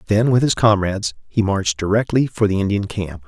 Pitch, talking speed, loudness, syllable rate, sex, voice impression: 100 Hz, 200 wpm, -18 LUFS, 5.8 syllables/s, male, masculine, adult-like, tensed, clear, fluent, cool, intellectual, calm, kind, modest